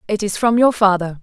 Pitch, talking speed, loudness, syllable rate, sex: 205 Hz, 245 wpm, -16 LUFS, 5.6 syllables/s, female